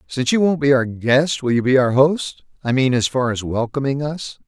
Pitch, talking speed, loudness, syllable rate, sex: 135 Hz, 230 wpm, -18 LUFS, 5.1 syllables/s, male